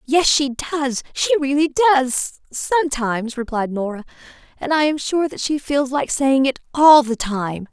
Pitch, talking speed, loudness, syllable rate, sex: 275 Hz, 165 wpm, -18 LUFS, 4.4 syllables/s, female